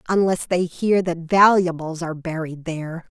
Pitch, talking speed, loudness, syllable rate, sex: 170 Hz, 150 wpm, -20 LUFS, 5.0 syllables/s, female